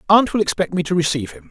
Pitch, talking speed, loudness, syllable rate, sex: 165 Hz, 280 wpm, -19 LUFS, 7.5 syllables/s, male